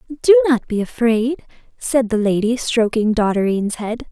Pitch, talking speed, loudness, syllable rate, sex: 235 Hz, 145 wpm, -17 LUFS, 5.2 syllables/s, female